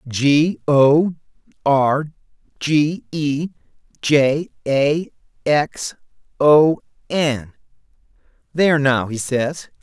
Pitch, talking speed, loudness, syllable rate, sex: 145 Hz, 90 wpm, -18 LUFS, 4.0 syllables/s, male